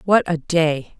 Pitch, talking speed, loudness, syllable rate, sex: 165 Hz, 180 wpm, -19 LUFS, 3.6 syllables/s, female